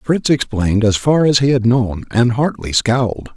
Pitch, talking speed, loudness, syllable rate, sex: 120 Hz, 195 wpm, -15 LUFS, 4.8 syllables/s, male